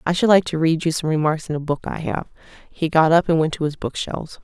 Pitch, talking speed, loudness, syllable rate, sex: 160 Hz, 300 wpm, -20 LUFS, 6.1 syllables/s, female